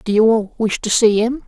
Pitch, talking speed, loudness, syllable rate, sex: 225 Hz, 245 wpm, -16 LUFS, 4.7 syllables/s, male